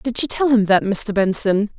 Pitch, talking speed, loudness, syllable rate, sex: 215 Hz, 235 wpm, -17 LUFS, 4.7 syllables/s, female